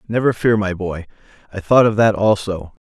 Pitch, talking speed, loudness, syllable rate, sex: 105 Hz, 170 wpm, -17 LUFS, 5.1 syllables/s, male